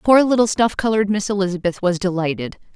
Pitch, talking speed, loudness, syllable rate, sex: 200 Hz, 175 wpm, -19 LUFS, 6.4 syllables/s, female